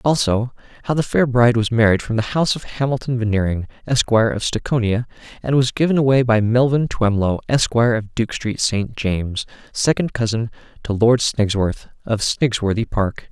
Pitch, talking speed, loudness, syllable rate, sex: 115 Hz, 165 wpm, -19 LUFS, 5.3 syllables/s, male